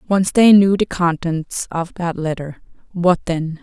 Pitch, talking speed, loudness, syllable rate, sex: 175 Hz, 150 wpm, -17 LUFS, 3.9 syllables/s, female